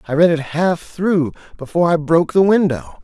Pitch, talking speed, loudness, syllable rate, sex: 160 Hz, 200 wpm, -16 LUFS, 5.7 syllables/s, male